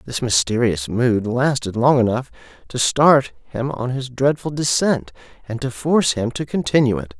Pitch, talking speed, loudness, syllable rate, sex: 125 Hz, 165 wpm, -19 LUFS, 4.6 syllables/s, male